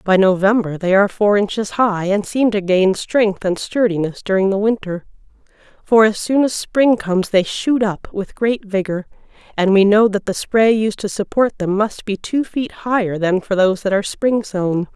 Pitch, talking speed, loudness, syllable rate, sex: 205 Hz, 205 wpm, -17 LUFS, 4.8 syllables/s, female